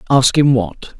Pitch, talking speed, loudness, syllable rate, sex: 130 Hz, 180 wpm, -14 LUFS, 3.8 syllables/s, male